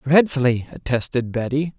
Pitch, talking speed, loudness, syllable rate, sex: 135 Hz, 100 wpm, -21 LUFS, 5.2 syllables/s, male